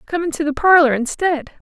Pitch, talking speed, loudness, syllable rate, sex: 310 Hz, 175 wpm, -16 LUFS, 5.4 syllables/s, female